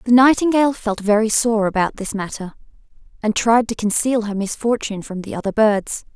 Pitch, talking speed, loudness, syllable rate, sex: 220 Hz, 175 wpm, -18 LUFS, 5.5 syllables/s, female